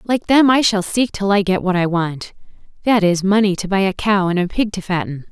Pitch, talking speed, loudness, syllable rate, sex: 195 Hz, 250 wpm, -17 LUFS, 5.3 syllables/s, female